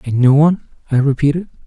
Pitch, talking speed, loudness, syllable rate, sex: 145 Hz, 180 wpm, -15 LUFS, 6.8 syllables/s, male